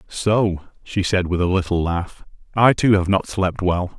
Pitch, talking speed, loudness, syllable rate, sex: 95 Hz, 195 wpm, -19 LUFS, 4.2 syllables/s, male